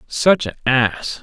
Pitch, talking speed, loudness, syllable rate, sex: 140 Hz, 145 wpm, -17 LUFS, 3.1 syllables/s, male